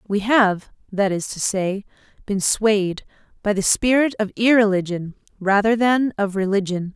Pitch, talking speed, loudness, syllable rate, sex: 205 Hz, 145 wpm, -20 LUFS, 4.4 syllables/s, female